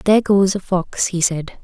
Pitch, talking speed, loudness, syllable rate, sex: 185 Hz, 220 wpm, -17 LUFS, 4.7 syllables/s, female